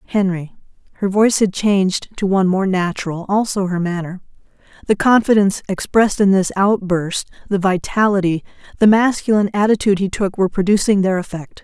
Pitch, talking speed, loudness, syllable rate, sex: 195 Hz, 145 wpm, -17 LUFS, 5.8 syllables/s, female